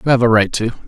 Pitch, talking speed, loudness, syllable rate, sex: 115 Hz, 345 wpm, -15 LUFS, 7.7 syllables/s, male